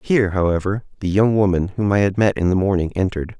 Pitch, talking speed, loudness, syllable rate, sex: 95 Hz, 230 wpm, -19 LUFS, 6.4 syllables/s, male